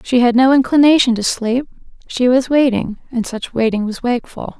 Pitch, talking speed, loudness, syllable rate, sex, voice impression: 245 Hz, 185 wpm, -15 LUFS, 5.3 syllables/s, female, feminine, slightly adult-like, slightly cute, friendly, slightly kind